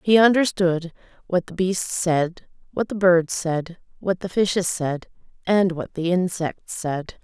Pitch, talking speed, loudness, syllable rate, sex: 180 Hz, 160 wpm, -22 LUFS, 3.9 syllables/s, female